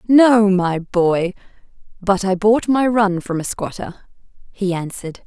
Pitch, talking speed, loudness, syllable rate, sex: 195 Hz, 150 wpm, -17 LUFS, 4.0 syllables/s, female